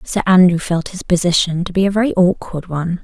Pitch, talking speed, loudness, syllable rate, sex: 180 Hz, 220 wpm, -16 LUFS, 5.9 syllables/s, female